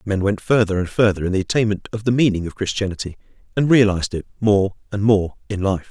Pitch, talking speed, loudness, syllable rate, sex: 100 Hz, 215 wpm, -19 LUFS, 6.2 syllables/s, male